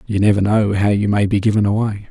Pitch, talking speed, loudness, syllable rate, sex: 105 Hz, 255 wpm, -16 LUFS, 6.2 syllables/s, male